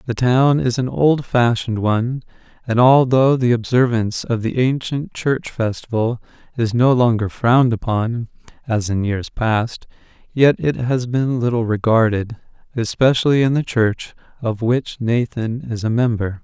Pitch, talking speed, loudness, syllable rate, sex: 120 Hz, 145 wpm, -18 LUFS, 4.4 syllables/s, male